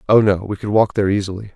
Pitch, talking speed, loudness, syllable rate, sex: 100 Hz, 270 wpm, -17 LUFS, 7.5 syllables/s, male